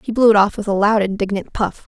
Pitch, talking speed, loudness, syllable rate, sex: 205 Hz, 280 wpm, -17 LUFS, 6.2 syllables/s, female